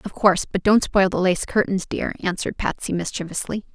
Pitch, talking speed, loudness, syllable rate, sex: 190 Hz, 190 wpm, -22 LUFS, 5.9 syllables/s, female